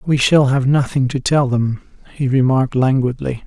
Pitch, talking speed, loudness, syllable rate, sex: 130 Hz, 175 wpm, -16 LUFS, 4.9 syllables/s, male